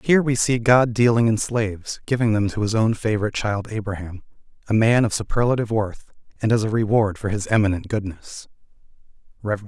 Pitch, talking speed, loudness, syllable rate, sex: 110 Hz, 175 wpm, -21 LUFS, 5.9 syllables/s, male